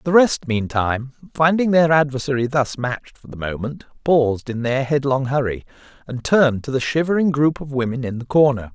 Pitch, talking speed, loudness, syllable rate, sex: 135 Hz, 185 wpm, -19 LUFS, 5.5 syllables/s, male